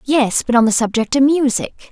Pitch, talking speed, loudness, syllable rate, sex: 255 Hz, 220 wpm, -15 LUFS, 5.0 syllables/s, female